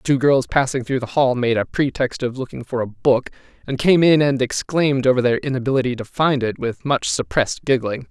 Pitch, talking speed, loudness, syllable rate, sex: 130 Hz, 215 wpm, -19 LUFS, 5.5 syllables/s, male